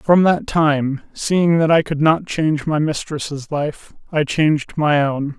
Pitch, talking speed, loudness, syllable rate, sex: 150 Hz, 180 wpm, -18 LUFS, 3.7 syllables/s, male